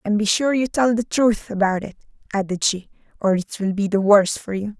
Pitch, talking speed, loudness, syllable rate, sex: 210 Hz, 240 wpm, -20 LUFS, 5.5 syllables/s, female